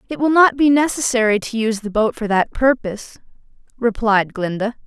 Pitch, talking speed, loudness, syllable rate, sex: 230 Hz, 175 wpm, -17 LUFS, 5.4 syllables/s, female